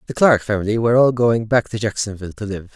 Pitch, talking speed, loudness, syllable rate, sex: 110 Hz, 240 wpm, -18 LUFS, 6.6 syllables/s, male